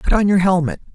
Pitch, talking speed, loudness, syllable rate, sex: 185 Hz, 255 wpm, -17 LUFS, 6.4 syllables/s, female